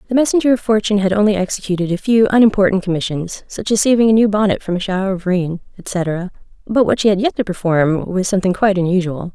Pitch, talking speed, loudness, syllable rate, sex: 195 Hz, 220 wpm, -16 LUFS, 6.5 syllables/s, female